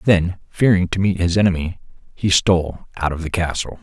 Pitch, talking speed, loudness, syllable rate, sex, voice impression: 90 Hz, 190 wpm, -19 LUFS, 5.4 syllables/s, male, very masculine, very old, very thick, slightly relaxed, very powerful, very dark, very soft, very muffled, slightly halting, very raspy, cool, intellectual, very sincere, very calm, very mature, slightly friendly, slightly reassuring, very unique, elegant, very wild, slightly sweet, slightly lively, kind, very modest